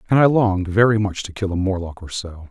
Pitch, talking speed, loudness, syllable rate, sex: 100 Hz, 265 wpm, -19 LUFS, 6.1 syllables/s, male